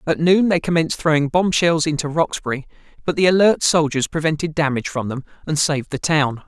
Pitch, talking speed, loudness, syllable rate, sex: 155 Hz, 185 wpm, -19 LUFS, 6.0 syllables/s, male